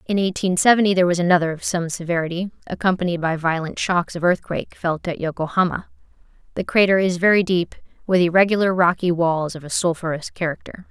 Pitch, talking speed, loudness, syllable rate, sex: 175 Hz, 170 wpm, -20 LUFS, 6.1 syllables/s, female